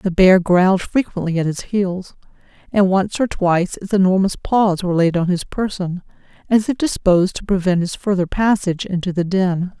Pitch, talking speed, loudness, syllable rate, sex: 185 Hz, 185 wpm, -18 LUFS, 5.2 syllables/s, female